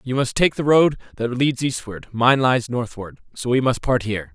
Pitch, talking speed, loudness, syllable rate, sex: 125 Hz, 220 wpm, -20 LUFS, 4.9 syllables/s, male